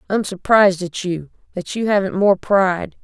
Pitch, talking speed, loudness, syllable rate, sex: 190 Hz, 160 wpm, -18 LUFS, 5.0 syllables/s, female